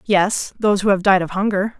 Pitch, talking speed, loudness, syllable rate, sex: 195 Hz, 235 wpm, -18 LUFS, 5.7 syllables/s, female